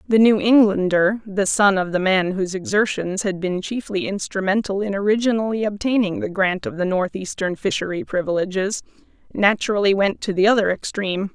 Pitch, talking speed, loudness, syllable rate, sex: 200 Hz, 150 wpm, -20 LUFS, 5.4 syllables/s, female